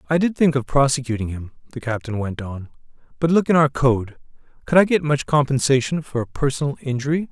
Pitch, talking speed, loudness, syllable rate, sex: 135 Hz, 195 wpm, -20 LUFS, 5.9 syllables/s, male